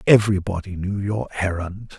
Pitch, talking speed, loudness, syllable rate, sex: 100 Hz, 120 wpm, -23 LUFS, 5.0 syllables/s, male